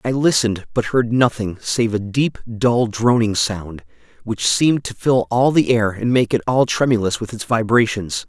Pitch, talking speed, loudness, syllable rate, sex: 115 Hz, 190 wpm, -18 LUFS, 4.7 syllables/s, male